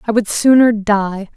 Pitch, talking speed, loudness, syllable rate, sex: 215 Hz, 175 wpm, -14 LUFS, 4.2 syllables/s, female